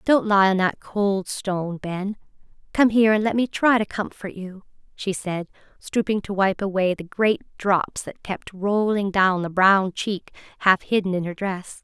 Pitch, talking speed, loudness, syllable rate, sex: 195 Hz, 190 wpm, -22 LUFS, 4.4 syllables/s, female